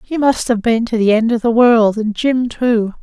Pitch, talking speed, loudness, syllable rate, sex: 230 Hz, 260 wpm, -14 LUFS, 4.6 syllables/s, female